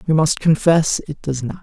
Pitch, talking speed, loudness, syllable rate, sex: 155 Hz, 220 wpm, -17 LUFS, 4.9 syllables/s, male